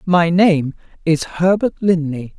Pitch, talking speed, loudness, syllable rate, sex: 170 Hz, 125 wpm, -16 LUFS, 3.7 syllables/s, female